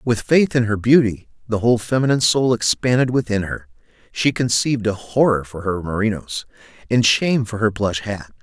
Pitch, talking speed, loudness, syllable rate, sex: 115 Hz, 180 wpm, -19 LUFS, 5.4 syllables/s, male